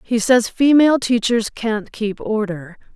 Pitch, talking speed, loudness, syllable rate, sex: 225 Hz, 140 wpm, -17 LUFS, 4.1 syllables/s, female